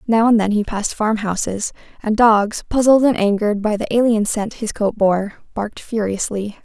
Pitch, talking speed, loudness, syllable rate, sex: 215 Hz, 180 wpm, -18 LUFS, 5.1 syllables/s, female